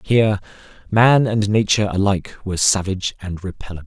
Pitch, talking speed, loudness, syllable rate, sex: 100 Hz, 140 wpm, -18 LUFS, 6.1 syllables/s, male